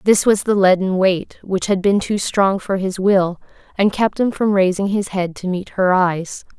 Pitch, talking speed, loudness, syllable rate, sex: 195 Hz, 220 wpm, -17 LUFS, 4.4 syllables/s, female